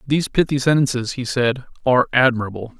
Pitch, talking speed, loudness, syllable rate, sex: 130 Hz, 150 wpm, -19 LUFS, 6.3 syllables/s, male